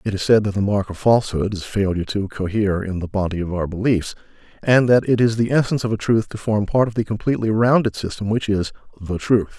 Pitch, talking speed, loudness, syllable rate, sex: 105 Hz, 245 wpm, -20 LUFS, 6.3 syllables/s, male